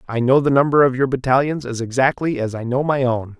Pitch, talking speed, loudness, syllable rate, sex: 130 Hz, 245 wpm, -18 LUFS, 5.9 syllables/s, male